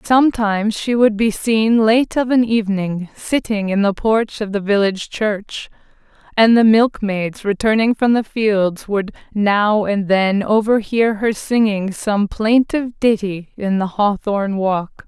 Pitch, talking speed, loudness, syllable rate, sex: 210 Hz, 155 wpm, -17 LUFS, 4.0 syllables/s, female